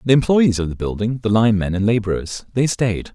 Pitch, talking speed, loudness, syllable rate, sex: 110 Hz, 210 wpm, -18 LUFS, 5.6 syllables/s, male